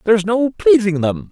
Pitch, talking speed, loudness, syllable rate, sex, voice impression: 185 Hz, 185 wpm, -15 LUFS, 5.0 syllables/s, male, masculine, adult-like, tensed, hard, fluent, cool, intellectual, calm, slightly mature, elegant, wild, lively, strict